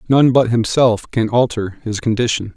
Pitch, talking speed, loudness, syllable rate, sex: 115 Hz, 165 wpm, -16 LUFS, 4.6 syllables/s, male